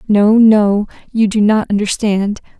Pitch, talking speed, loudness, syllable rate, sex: 210 Hz, 140 wpm, -13 LUFS, 3.9 syllables/s, female